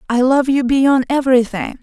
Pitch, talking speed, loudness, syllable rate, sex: 260 Hz, 165 wpm, -15 LUFS, 5.0 syllables/s, female